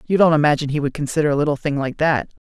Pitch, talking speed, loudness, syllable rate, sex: 150 Hz, 270 wpm, -19 LUFS, 7.8 syllables/s, male